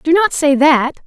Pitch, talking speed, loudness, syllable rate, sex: 300 Hz, 225 wpm, -13 LUFS, 3.9 syllables/s, female